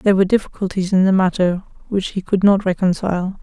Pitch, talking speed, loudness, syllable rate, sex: 190 Hz, 195 wpm, -18 LUFS, 6.4 syllables/s, female